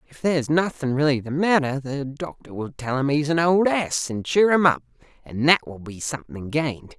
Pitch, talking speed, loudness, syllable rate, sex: 145 Hz, 215 wpm, -22 LUFS, 5.2 syllables/s, male